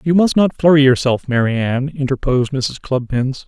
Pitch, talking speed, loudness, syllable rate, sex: 135 Hz, 175 wpm, -16 LUFS, 5.2 syllables/s, male